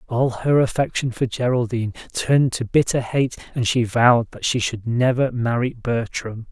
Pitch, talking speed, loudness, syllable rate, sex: 120 Hz, 165 wpm, -20 LUFS, 4.9 syllables/s, male